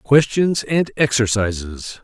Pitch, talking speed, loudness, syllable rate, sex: 120 Hz, 90 wpm, -18 LUFS, 3.6 syllables/s, male